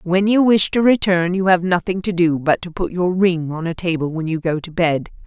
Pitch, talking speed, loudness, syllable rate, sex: 175 Hz, 260 wpm, -18 LUFS, 5.2 syllables/s, female